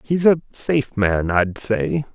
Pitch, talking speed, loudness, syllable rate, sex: 115 Hz, 170 wpm, -20 LUFS, 3.7 syllables/s, male